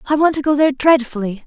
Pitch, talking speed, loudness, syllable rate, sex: 275 Hz, 245 wpm, -16 LUFS, 7.1 syllables/s, female